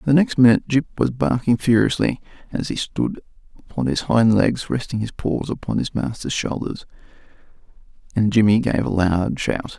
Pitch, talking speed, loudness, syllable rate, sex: 120 Hz, 165 wpm, -20 LUFS, 5.0 syllables/s, male